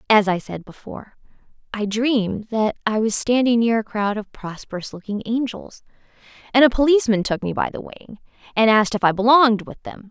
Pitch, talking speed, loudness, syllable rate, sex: 220 Hz, 190 wpm, -19 LUFS, 5.6 syllables/s, female